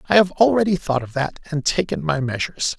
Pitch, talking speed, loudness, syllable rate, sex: 155 Hz, 215 wpm, -20 LUFS, 6.0 syllables/s, male